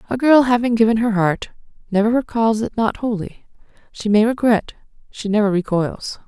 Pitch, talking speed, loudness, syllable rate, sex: 220 Hz, 165 wpm, -18 LUFS, 5.2 syllables/s, female